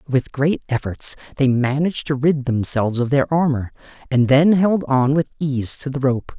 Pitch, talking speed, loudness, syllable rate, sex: 140 Hz, 190 wpm, -19 LUFS, 4.8 syllables/s, male